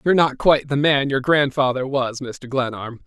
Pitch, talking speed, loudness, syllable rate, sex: 135 Hz, 195 wpm, -19 LUFS, 5.1 syllables/s, male